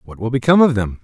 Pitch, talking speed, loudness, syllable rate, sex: 120 Hz, 290 wpm, -15 LUFS, 7.7 syllables/s, male